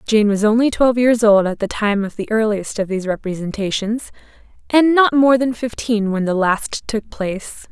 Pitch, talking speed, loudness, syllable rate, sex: 220 Hz, 195 wpm, -17 LUFS, 5.0 syllables/s, female